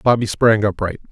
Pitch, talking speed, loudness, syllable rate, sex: 110 Hz, 160 wpm, -17 LUFS, 5.4 syllables/s, male